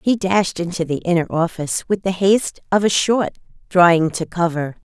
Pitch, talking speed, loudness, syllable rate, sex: 180 Hz, 185 wpm, -18 LUFS, 5.1 syllables/s, female